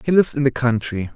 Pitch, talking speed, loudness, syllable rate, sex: 135 Hz, 260 wpm, -19 LUFS, 7.0 syllables/s, male